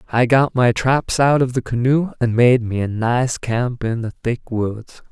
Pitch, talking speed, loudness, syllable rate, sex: 120 Hz, 210 wpm, -18 LUFS, 4.0 syllables/s, male